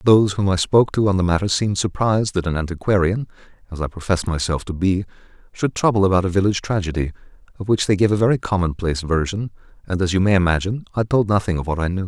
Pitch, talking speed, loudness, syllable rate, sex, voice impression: 95 Hz, 225 wpm, -20 LUFS, 6.5 syllables/s, male, very masculine, adult-like, thick, cool, sincere, slightly mature